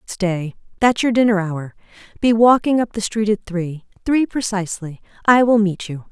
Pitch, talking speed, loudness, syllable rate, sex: 205 Hz, 175 wpm, -18 LUFS, 4.7 syllables/s, female